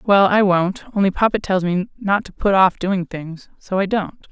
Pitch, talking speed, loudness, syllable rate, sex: 190 Hz, 220 wpm, -18 LUFS, 4.5 syllables/s, female